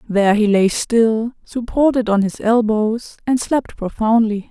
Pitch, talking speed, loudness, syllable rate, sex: 225 Hz, 145 wpm, -17 LUFS, 4.1 syllables/s, female